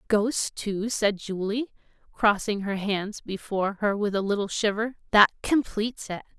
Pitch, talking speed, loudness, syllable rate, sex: 210 Hz, 140 wpm, -26 LUFS, 4.6 syllables/s, female